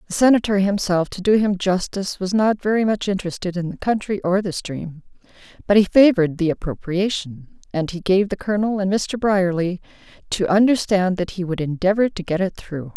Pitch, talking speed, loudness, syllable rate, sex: 190 Hz, 190 wpm, -20 LUFS, 5.5 syllables/s, female